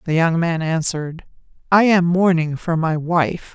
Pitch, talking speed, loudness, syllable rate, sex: 165 Hz, 170 wpm, -18 LUFS, 4.4 syllables/s, female